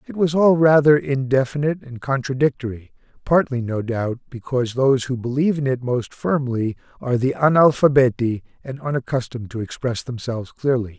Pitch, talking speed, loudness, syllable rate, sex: 130 Hz, 145 wpm, -20 LUFS, 5.6 syllables/s, male